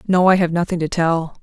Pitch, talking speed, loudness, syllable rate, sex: 170 Hz, 250 wpm, -17 LUFS, 5.6 syllables/s, female